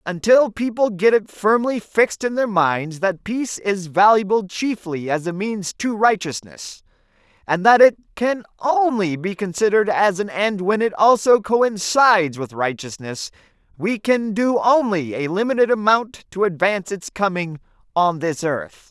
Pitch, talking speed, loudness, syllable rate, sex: 200 Hz, 155 wpm, -19 LUFS, 4.4 syllables/s, male